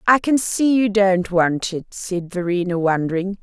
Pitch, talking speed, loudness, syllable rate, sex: 190 Hz, 175 wpm, -19 LUFS, 4.3 syllables/s, female